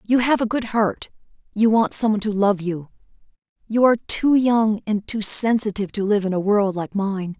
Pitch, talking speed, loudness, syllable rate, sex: 210 Hz, 210 wpm, -20 LUFS, 5.1 syllables/s, female